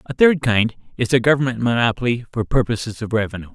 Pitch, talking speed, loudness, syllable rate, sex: 120 Hz, 185 wpm, -19 LUFS, 6.3 syllables/s, male